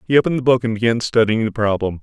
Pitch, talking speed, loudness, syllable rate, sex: 115 Hz, 265 wpm, -17 LUFS, 7.4 syllables/s, male